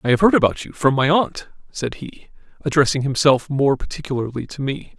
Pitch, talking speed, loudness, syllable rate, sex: 140 Hz, 195 wpm, -19 LUFS, 5.5 syllables/s, male